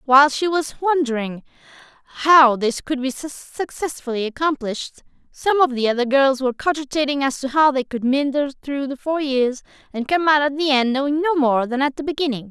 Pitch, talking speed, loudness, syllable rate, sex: 275 Hz, 190 wpm, -19 LUFS, 5.4 syllables/s, female